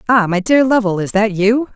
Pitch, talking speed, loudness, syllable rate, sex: 215 Hz, 240 wpm, -14 LUFS, 5.2 syllables/s, female